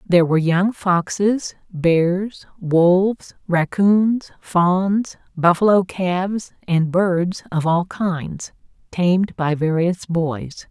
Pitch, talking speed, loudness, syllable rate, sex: 180 Hz, 105 wpm, -19 LUFS, 3.1 syllables/s, female